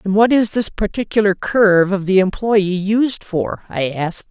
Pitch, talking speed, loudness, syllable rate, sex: 200 Hz, 180 wpm, -16 LUFS, 4.6 syllables/s, female